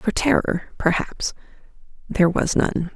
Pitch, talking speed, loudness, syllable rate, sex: 180 Hz, 100 wpm, -22 LUFS, 4.3 syllables/s, female